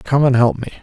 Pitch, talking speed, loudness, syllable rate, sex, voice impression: 125 Hz, 290 wpm, -15 LUFS, 5.7 syllables/s, male, very masculine, very adult-like, old, very thick, slightly relaxed, weak, slightly dark, hard, muffled, slightly fluent, very raspy, very cool, intellectual, sincere, very calm, very mature, friendly, very reassuring, very unique, slightly elegant, very wild, slightly sweet, slightly lively, very kind